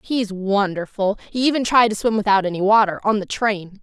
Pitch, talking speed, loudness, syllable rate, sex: 205 Hz, 205 wpm, -19 LUFS, 5.2 syllables/s, female